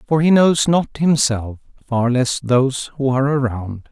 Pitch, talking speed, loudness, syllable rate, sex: 130 Hz, 155 wpm, -17 LUFS, 4.5 syllables/s, male